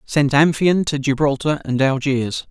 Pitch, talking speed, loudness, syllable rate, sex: 140 Hz, 145 wpm, -18 LUFS, 4.2 syllables/s, male